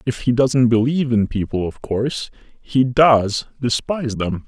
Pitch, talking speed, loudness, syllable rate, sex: 120 Hz, 160 wpm, -18 LUFS, 4.6 syllables/s, male